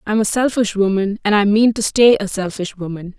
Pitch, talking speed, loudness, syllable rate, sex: 205 Hz, 225 wpm, -16 LUFS, 5.3 syllables/s, female